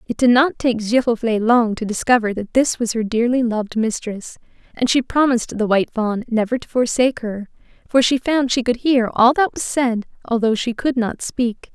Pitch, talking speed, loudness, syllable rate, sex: 235 Hz, 205 wpm, -18 LUFS, 5.1 syllables/s, female